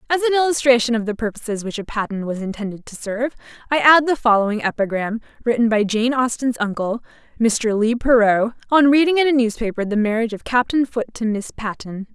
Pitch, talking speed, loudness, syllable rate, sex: 235 Hz, 195 wpm, -19 LUFS, 6.1 syllables/s, female